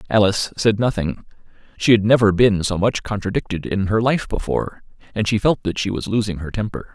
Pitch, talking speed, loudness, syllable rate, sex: 105 Hz, 200 wpm, -19 LUFS, 5.8 syllables/s, male